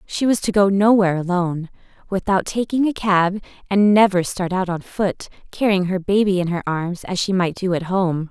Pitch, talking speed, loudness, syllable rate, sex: 190 Hz, 200 wpm, -19 LUFS, 5.1 syllables/s, female